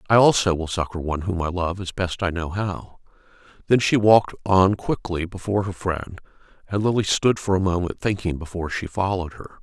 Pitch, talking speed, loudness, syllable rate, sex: 90 Hz, 200 wpm, -22 LUFS, 5.6 syllables/s, male